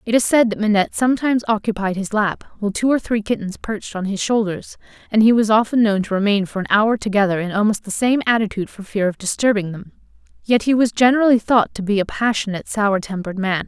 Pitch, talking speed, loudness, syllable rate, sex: 210 Hz, 225 wpm, -18 LUFS, 6.4 syllables/s, female